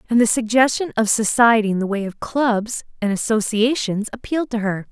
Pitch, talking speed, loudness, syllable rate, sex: 225 Hz, 185 wpm, -19 LUFS, 5.4 syllables/s, female